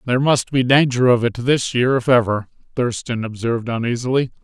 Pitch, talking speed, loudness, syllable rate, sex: 125 Hz, 175 wpm, -18 LUFS, 5.6 syllables/s, male